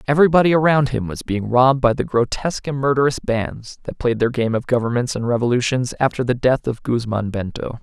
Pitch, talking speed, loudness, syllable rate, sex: 125 Hz, 200 wpm, -19 LUFS, 5.8 syllables/s, male